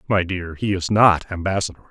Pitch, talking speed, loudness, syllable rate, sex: 95 Hz, 190 wpm, -20 LUFS, 5.2 syllables/s, male